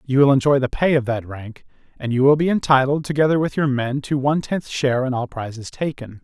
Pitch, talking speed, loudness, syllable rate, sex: 135 Hz, 240 wpm, -19 LUFS, 5.9 syllables/s, male